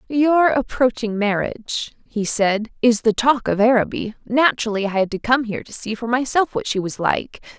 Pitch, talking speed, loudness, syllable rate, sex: 235 Hz, 190 wpm, -19 LUFS, 5.1 syllables/s, female